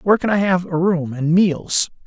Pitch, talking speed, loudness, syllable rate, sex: 180 Hz, 235 wpm, -18 LUFS, 4.8 syllables/s, male